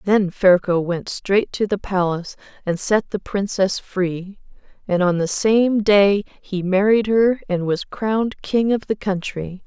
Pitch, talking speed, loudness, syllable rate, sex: 195 Hz, 170 wpm, -19 LUFS, 4.0 syllables/s, female